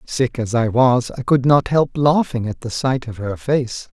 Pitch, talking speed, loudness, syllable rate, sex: 125 Hz, 225 wpm, -18 LUFS, 4.2 syllables/s, male